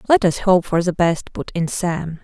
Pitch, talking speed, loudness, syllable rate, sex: 180 Hz, 240 wpm, -19 LUFS, 4.5 syllables/s, female